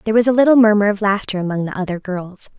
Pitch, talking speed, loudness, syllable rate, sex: 205 Hz, 255 wpm, -16 LUFS, 7.1 syllables/s, female